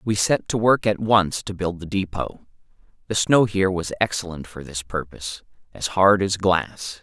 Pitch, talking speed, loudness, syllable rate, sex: 95 Hz, 190 wpm, -22 LUFS, 4.8 syllables/s, male